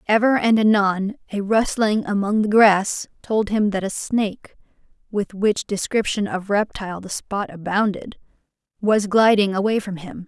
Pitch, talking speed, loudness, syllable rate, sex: 205 Hz, 150 wpm, -20 LUFS, 4.5 syllables/s, female